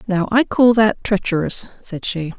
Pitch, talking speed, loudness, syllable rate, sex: 200 Hz, 175 wpm, -17 LUFS, 4.4 syllables/s, female